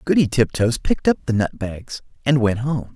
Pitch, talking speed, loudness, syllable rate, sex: 120 Hz, 205 wpm, -20 LUFS, 5.2 syllables/s, male